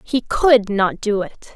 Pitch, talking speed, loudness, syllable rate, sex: 220 Hz, 195 wpm, -17 LUFS, 3.5 syllables/s, female